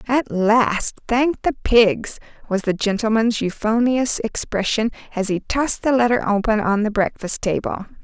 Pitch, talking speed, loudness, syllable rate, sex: 225 Hz, 150 wpm, -19 LUFS, 4.5 syllables/s, female